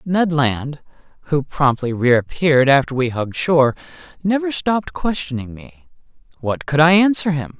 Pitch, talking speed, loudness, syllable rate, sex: 150 Hz, 140 wpm, -18 LUFS, 3.6 syllables/s, male